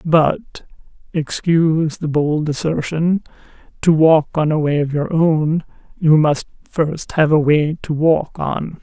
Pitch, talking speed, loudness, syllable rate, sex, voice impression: 155 Hz, 150 wpm, -17 LUFS, 3.1 syllables/s, female, slightly masculine, feminine, very gender-neutral, very adult-like, middle-aged, slightly thin, slightly relaxed, slightly weak, slightly dark, soft, slightly muffled, fluent, very cool, very intellectual, very refreshing, sincere, very calm, very friendly, very reassuring, very unique, elegant, sweet, very kind, slightly modest